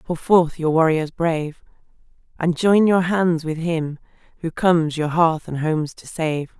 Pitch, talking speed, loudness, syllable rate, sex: 165 Hz, 175 wpm, -20 LUFS, 4.3 syllables/s, female